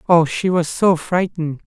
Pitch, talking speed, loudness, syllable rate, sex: 170 Hz, 175 wpm, -18 LUFS, 4.8 syllables/s, male